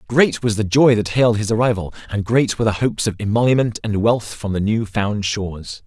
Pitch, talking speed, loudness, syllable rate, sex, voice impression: 110 Hz, 225 wpm, -18 LUFS, 5.7 syllables/s, male, very masculine, slightly young, slightly adult-like, thick, tensed, slightly powerful, slightly bright, slightly hard, clear, fluent, slightly raspy, cool, intellectual, refreshing, very sincere, slightly calm, mature, friendly, very reassuring, slightly unique, wild, sweet, lively, intense